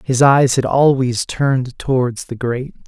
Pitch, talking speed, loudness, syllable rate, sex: 130 Hz, 165 wpm, -16 LUFS, 4.1 syllables/s, male